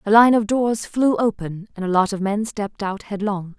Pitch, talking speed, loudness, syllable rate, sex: 210 Hz, 235 wpm, -20 LUFS, 5.1 syllables/s, female